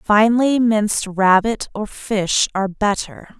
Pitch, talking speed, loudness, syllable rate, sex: 210 Hz, 125 wpm, -17 LUFS, 4.0 syllables/s, female